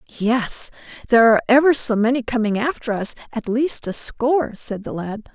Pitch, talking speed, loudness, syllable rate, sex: 235 Hz, 180 wpm, -19 LUFS, 5.4 syllables/s, female